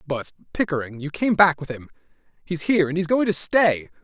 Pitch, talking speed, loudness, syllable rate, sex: 165 Hz, 210 wpm, -21 LUFS, 6.1 syllables/s, male